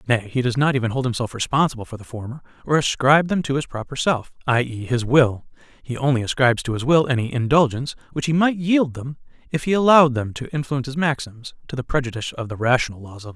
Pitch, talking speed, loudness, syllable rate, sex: 130 Hz, 240 wpm, -20 LUFS, 6.6 syllables/s, male